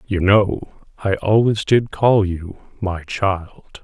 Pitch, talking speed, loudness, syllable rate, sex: 100 Hz, 140 wpm, -18 LUFS, 3.1 syllables/s, male